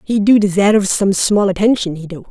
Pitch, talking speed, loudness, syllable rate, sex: 200 Hz, 210 wpm, -14 LUFS, 5.5 syllables/s, female